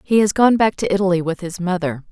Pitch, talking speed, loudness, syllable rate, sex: 185 Hz, 255 wpm, -18 LUFS, 6.1 syllables/s, female